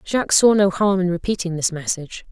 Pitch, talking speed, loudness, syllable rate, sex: 185 Hz, 205 wpm, -19 LUFS, 6.0 syllables/s, female